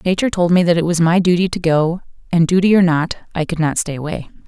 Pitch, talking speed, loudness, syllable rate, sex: 170 Hz, 255 wpm, -16 LUFS, 6.4 syllables/s, female